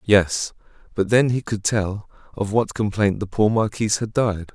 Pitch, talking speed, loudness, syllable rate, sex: 105 Hz, 185 wpm, -21 LUFS, 4.4 syllables/s, male